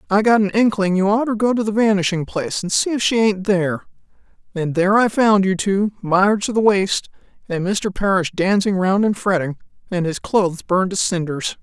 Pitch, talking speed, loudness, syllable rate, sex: 195 Hz, 205 wpm, -18 LUFS, 5.5 syllables/s, female